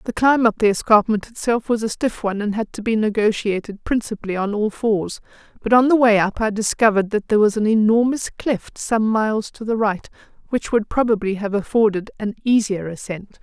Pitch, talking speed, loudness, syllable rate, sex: 215 Hz, 200 wpm, -19 LUFS, 5.5 syllables/s, female